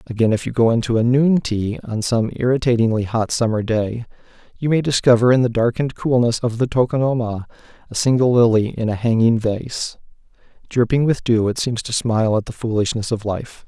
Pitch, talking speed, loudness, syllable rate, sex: 120 Hz, 190 wpm, -18 LUFS, 5.4 syllables/s, male